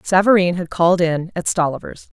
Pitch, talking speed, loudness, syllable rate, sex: 175 Hz, 165 wpm, -17 LUFS, 5.6 syllables/s, female